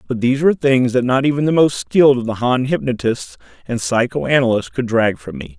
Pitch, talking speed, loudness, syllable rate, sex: 120 Hz, 215 wpm, -16 LUFS, 5.6 syllables/s, male